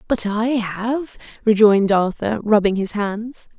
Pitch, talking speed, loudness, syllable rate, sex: 215 Hz, 135 wpm, -18 LUFS, 3.9 syllables/s, female